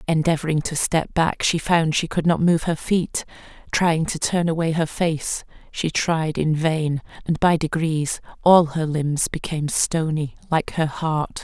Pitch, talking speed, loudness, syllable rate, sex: 160 Hz, 175 wpm, -21 LUFS, 4.1 syllables/s, female